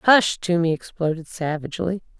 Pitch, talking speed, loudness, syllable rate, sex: 175 Hz, 110 wpm, -23 LUFS, 5.2 syllables/s, female